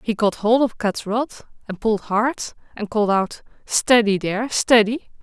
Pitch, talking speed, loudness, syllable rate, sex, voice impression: 220 Hz, 170 wpm, -20 LUFS, 4.9 syllables/s, female, feminine, adult-like, tensed, slightly powerful, bright, hard, muffled, slightly raspy, intellectual, friendly, reassuring, elegant, lively, slightly kind